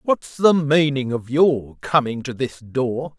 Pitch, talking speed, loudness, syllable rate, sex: 135 Hz, 170 wpm, -20 LUFS, 3.6 syllables/s, male